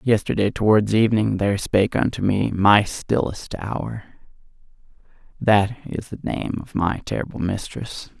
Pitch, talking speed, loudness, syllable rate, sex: 105 Hz, 130 wpm, -21 LUFS, 4.5 syllables/s, male